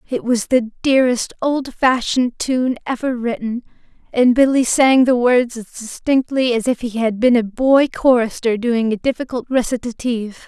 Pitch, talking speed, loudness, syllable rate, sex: 245 Hz, 155 wpm, -17 LUFS, 4.7 syllables/s, female